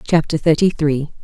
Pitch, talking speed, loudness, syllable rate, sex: 155 Hz, 145 wpm, -17 LUFS, 4.7 syllables/s, female